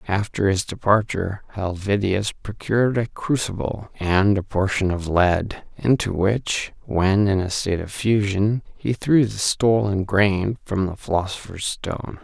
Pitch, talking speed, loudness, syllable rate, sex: 100 Hz, 140 wpm, -22 LUFS, 4.2 syllables/s, male